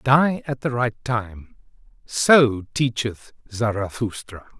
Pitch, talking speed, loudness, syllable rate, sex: 120 Hz, 105 wpm, -21 LUFS, 3.2 syllables/s, male